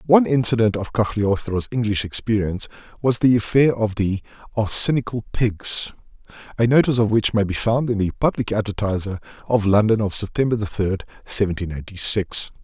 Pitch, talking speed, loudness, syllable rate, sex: 110 Hz, 145 wpm, -20 LUFS, 5.5 syllables/s, male